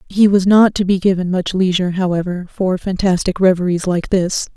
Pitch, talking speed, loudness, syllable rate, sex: 185 Hz, 185 wpm, -16 LUFS, 5.5 syllables/s, female